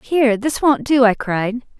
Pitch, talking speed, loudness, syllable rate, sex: 245 Hz, 200 wpm, -17 LUFS, 4.6 syllables/s, female